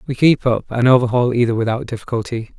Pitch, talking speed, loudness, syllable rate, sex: 120 Hz, 185 wpm, -17 LUFS, 6.3 syllables/s, male